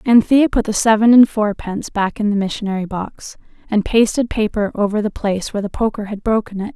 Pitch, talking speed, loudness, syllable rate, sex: 210 Hz, 205 wpm, -17 LUFS, 5.9 syllables/s, female